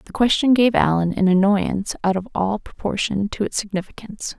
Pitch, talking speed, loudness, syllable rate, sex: 200 Hz, 180 wpm, -20 LUFS, 5.6 syllables/s, female